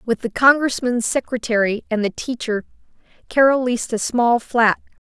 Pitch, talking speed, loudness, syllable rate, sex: 240 Hz, 140 wpm, -19 LUFS, 4.9 syllables/s, female